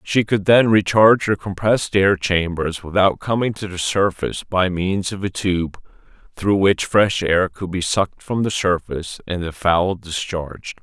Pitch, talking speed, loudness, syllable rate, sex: 95 Hz, 175 wpm, -19 LUFS, 4.5 syllables/s, male